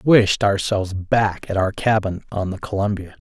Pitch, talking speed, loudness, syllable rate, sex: 100 Hz, 185 wpm, -20 LUFS, 5.1 syllables/s, male